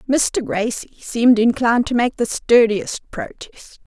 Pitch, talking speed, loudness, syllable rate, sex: 230 Hz, 135 wpm, -18 LUFS, 4.2 syllables/s, female